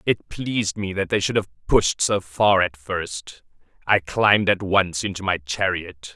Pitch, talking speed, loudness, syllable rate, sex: 90 Hz, 185 wpm, -21 LUFS, 4.2 syllables/s, male